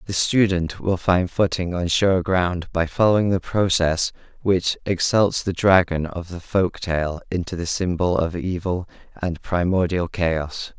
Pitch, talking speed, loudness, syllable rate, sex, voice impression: 90 Hz, 155 wpm, -21 LUFS, 4.2 syllables/s, male, masculine, adult-like, tensed, slightly powerful, slightly bright, cool, calm, friendly, reassuring, wild, slightly lively, slightly modest